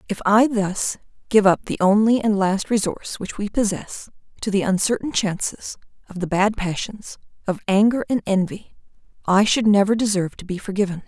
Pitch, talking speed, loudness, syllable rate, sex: 200 Hz, 175 wpm, -20 LUFS, 5.2 syllables/s, female